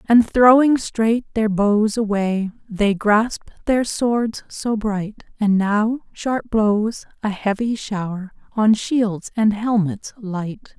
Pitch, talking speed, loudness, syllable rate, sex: 215 Hz, 135 wpm, -19 LUFS, 3.2 syllables/s, female